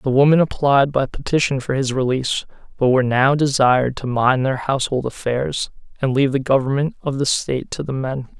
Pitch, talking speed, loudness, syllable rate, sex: 135 Hz, 195 wpm, -19 LUFS, 5.7 syllables/s, male